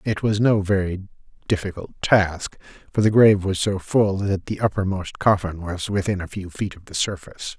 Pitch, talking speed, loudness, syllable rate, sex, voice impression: 95 Hz, 190 wpm, -22 LUFS, 5.1 syllables/s, male, masculine, middle-aged, powerful, hard, slightly muffled, raspy, sincere, mature, wild, lively, strict, sharp